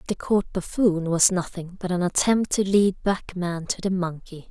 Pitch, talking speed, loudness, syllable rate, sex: 185 Hz, 200 wpm, -23 LUFS, 4.5 syllables/s, female